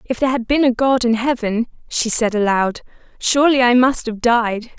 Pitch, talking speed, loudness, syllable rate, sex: 240 Hz, 200 wpm, -17 LUFS, 5.2 syllables/s, female